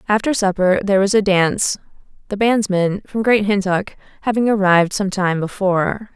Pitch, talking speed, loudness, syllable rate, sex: 200 Hz, 155 wpm, -17 LUFS, 5.4 syllables/s, female